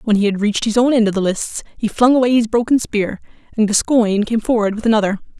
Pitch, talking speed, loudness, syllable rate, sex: 220 Hz, 245 wpm, -16 LUFS, 6.4 syllables/s, female